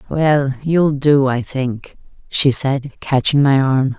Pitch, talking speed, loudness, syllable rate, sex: 135 Hz, 150 wpm, -16 LUFS, 3.3 syllables/s, female